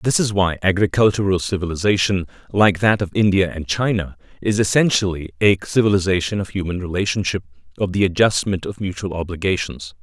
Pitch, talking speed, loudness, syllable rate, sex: 95 Hz, 145 wpm, -19 LUFS, 5.8 syllables/s, male